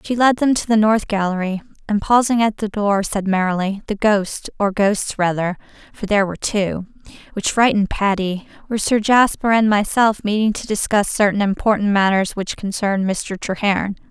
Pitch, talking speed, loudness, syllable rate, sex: 205 Hz, 165 wpm, -18 LUFS, 5.2 syllables/s, female